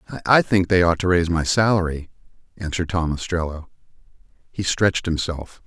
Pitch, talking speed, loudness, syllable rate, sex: 85 Hz, 150 wpm, -20 LUFS, 6.0 syllables/s, male